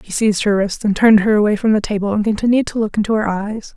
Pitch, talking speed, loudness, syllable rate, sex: 210 Hz, 285 wpm, -16 LUFS, 6.9 syllables/s, female